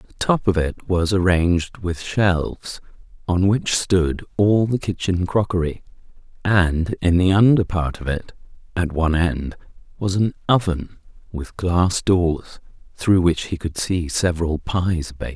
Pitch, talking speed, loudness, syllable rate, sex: 90 Hz, 150 wpm, -20 LUFS, 4.2 syllables/s, male